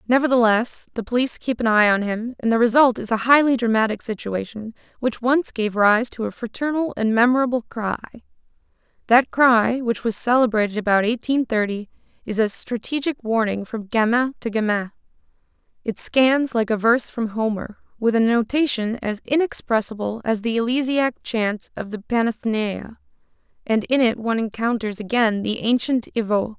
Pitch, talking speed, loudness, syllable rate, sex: 230 Hz, 160 wpm, -21 LUFS, 5.2 syllables/s, female